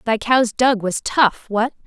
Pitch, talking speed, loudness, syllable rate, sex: 230 Hz, 195 wpm, -18 LUFS, 3.9 syllables/s, female